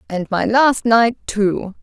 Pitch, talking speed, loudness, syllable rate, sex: 220 Hz, 165 wpm, -16 LUFS, 3.3 syllables/s, female